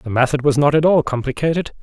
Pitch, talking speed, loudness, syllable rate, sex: 140 Hz, 230 wpm, -17 LUFS, 6.4 syllables/s, male